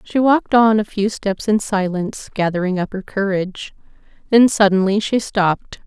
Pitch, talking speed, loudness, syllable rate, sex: 205 Hz, 165 wpm, -17 LUFS, 5.1 syllables/s, female